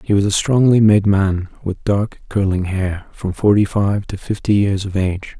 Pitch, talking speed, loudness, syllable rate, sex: 100 Hz, 200 wpm, -17 LUFS, 4.6 syllables/s, male